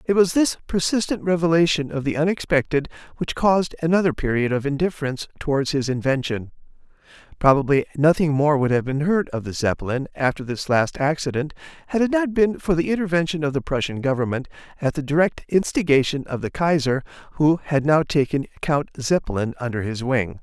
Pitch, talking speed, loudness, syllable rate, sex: 150 Hz, 170 wpm, -21 LUFS, 5.8 syllables/s, male